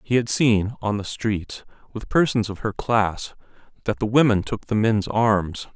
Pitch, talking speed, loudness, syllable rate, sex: 110 Hz, 190 wpm, -22 LUFS, 4.2 syllables/s, male